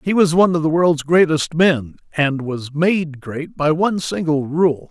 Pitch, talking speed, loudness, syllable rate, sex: 160 Hz, 195 wpm, -17 LUFS, 4.3 syllables/s, male